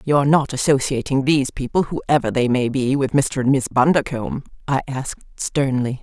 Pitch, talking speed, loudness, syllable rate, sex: 130 Hz, 170 wpm, -19 LUFS, 5.3 syllables/s, female